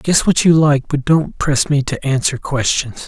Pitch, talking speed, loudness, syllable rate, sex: 145 Hz, 215 wpm, -15 LUFS, 4.3 syllables/s, male